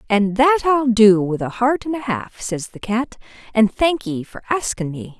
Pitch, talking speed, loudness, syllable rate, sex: 230 Hz, 220 wpm, -19 LUFS, 4.4 syllables/s, female